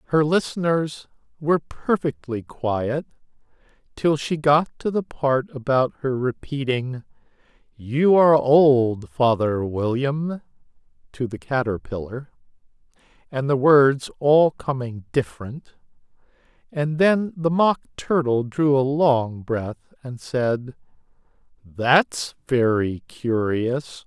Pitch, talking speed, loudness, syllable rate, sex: 135 Hz, 105 wpm, -21 LUFS, 3.5 syllables/s, male